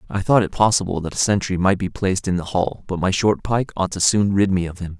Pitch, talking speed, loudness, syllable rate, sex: 95 Hz, 290 wpm, -20 LUFS, 5.9 syllables/s, male